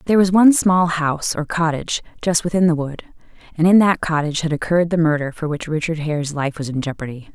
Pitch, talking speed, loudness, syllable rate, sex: 160 Hz, 220 wpm, -18 LUFS, 6.4 syllables/s, female